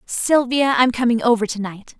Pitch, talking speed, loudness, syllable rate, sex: 240 Hz, 180 wpm, -18 LUFS, 4.9 syllables/s, female